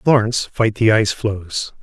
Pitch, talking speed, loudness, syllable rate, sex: 110 Hz, 165 wpm, -18 LUFS, 4.9 syllables/s, male